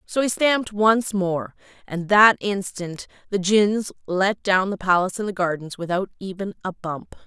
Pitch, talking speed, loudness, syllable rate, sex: 195 Hz, 175 wpm, -21 LUFS, 4.6 syllables/s, female